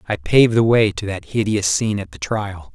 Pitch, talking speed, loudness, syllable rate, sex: 105 Hz, 240 wpm, -18 LUFS, 5.5 syllables/s, male